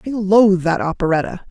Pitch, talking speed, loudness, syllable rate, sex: 190 Hz, 160 wpm, -16 LUFS, 6.0 syllables/s, female